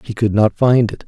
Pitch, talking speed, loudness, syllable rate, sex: 110 Hz, 280 wpm, -15 LUFS, 5.2 syllables/s, male